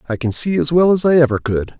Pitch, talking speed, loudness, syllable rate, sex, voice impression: 145 Hz, 300 wpm, -15 LUFS, 6.4 syllables/s, male, masculine, adult-like, slightly muffled, slightly refreshing, sincere, friendly